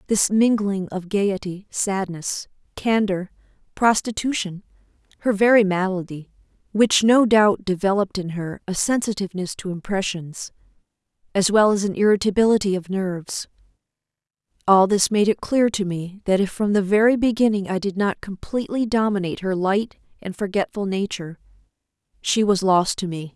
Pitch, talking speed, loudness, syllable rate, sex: 200 Hz, 140 wpm, -21 LUFS, 5.1 syllables/s, female